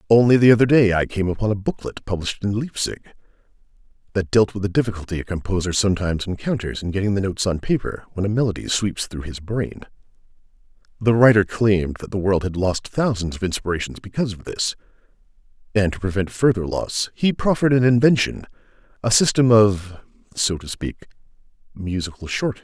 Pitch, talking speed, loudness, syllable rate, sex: 100 Hz, 165 wpm, -20 LUFS, 6.1 syllables/s, male